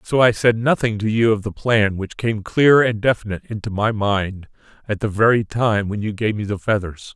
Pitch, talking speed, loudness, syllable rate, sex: 105 Hz, 225 wpm, -19 LUFS, 5.1 syllables/s, male